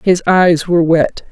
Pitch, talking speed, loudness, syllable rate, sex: 170 Hz, 180 wpm, -12 LUFS, 4.4 syllables/s, female